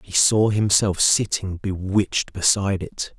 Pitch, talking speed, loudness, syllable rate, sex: 95 Hz, 130 wpm, -20 LUFS, 4.3 syllables/s, male